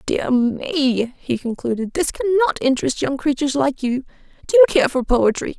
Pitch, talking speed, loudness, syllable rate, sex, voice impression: 275 Hz, 170 wpm, -19 LUFS, 5.4 syllables/s, female, feminine, middle-aged, slightly relaxed, powerful, slightly raspy, intellectual, slightly strict, slightly intense, sharp